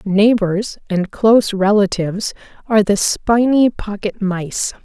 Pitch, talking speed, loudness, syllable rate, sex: 205 Hz, 110 wpm, -16 LUFS, 4.0 syllables/s, female